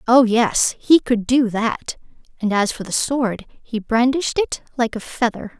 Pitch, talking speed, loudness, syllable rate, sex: 235 Hz, 180 wpm, -19 LUFS, 4.1 syllables/s, female